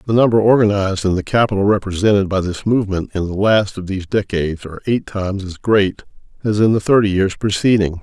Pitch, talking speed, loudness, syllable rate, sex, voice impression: 100 Hz, 200 wpm, -17 LUFS, 6.3 syllables/s, male, very masculine, slightly old, very thick, slightly relaxed, very powerful, dark, slightly hard, clear, fluent, cool, intellectual, slightly refreshing, sincere, very calm, very mature, friendly, very reassuring, unique, slightly elegant, wild, slightly sweet, lively, kind